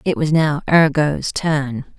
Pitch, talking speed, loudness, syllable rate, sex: 150 Hz, 150 wpm, -17 LUFS, 4.0 syllables/s, female